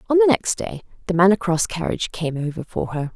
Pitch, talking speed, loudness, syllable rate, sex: 185 Hz, 230 wpm, -21 LUFS, 5.9 syllables/s, female